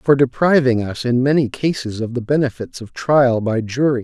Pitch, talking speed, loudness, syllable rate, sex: 130 Hz, 195 wpm, -17 LUFS, 5.0 syllables/s, male